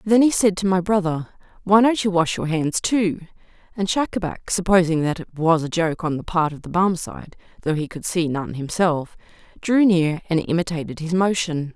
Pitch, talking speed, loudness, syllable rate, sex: 175 Hz, 200 wpm, -21 LUFS, 4.9 syllables/s, female